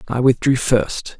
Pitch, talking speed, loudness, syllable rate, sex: 125 Hz, 150 wpm, -17 LUFS, 3.9 syllables/s, male